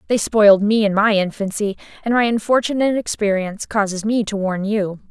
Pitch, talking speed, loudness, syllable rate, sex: 210 Hz, 175 wpm, -18 LUFS, 5.7 syllables/s, female